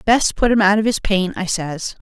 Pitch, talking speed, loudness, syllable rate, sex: 200 Hz, 260 wpm, -18 LUFS, 4.8 syllables/s, female